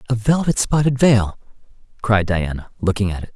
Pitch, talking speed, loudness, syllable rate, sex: 110 Hz, 160 wpm, -18 LUFS, 5.3 syllables/s, male